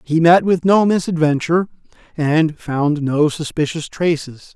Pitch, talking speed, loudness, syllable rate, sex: 160 Hz, 130 wpm, -17 LUFS, 4.3 syllables/s, male